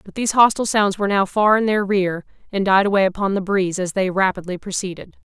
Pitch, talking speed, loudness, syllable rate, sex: 195 Hz, 225 wpm, -19 LUFS, 6.4 syllables/s, female